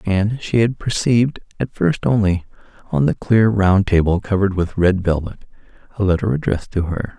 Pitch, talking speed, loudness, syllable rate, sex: 100 Hz, 175 wpm, -18 LUFS, 5.2 syllables/s, male